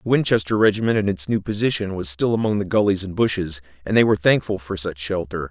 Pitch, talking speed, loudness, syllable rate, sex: 95 Hz, 230 wpm, -20 LUFS, 6.4 syllables/s, male